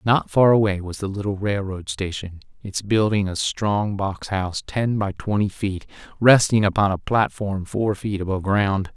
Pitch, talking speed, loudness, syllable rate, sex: 100 Hz, 175 wpm, -21 LUFS, 4.6 syllables/s, male